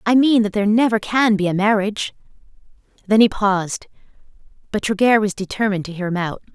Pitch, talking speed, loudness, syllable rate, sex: 205 Hz, 185 wpm, -18 LUFS, 6.3 syllables/s, female